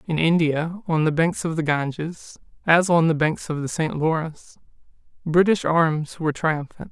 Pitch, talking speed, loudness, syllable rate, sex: 160 Hz, 175 wpm, -22 LUFS, 4.7 syllables/s, male